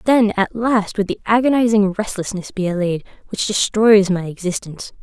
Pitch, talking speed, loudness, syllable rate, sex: 205 Hz, 155 wpm, -18 LUFS, 5.1 syllables/s, female